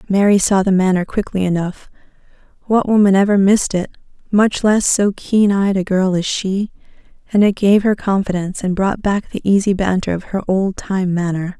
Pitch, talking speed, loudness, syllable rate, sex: 195 Hz, 175 wpm, -16 LUFS, 5.1 syllables/s, female